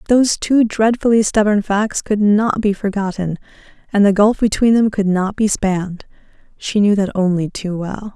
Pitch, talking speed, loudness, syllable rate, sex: 205 Hz, 175 wpm, -16 LUFS, 4.8 syllables/s, female